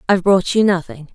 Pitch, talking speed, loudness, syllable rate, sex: 185 Hz, 210 wpm, -16 LUFS, 6.3 syllables/s, female